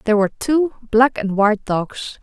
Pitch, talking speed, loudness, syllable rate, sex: 225 Hz, 190 wpm, -18 LUFS, 4.7 syllables/s, female